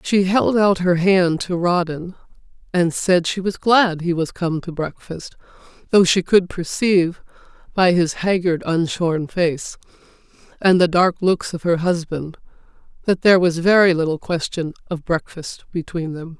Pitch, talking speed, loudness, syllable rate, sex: 175 Hz, 155 wpm, -19 LUFS, 4.4 syllables/s, female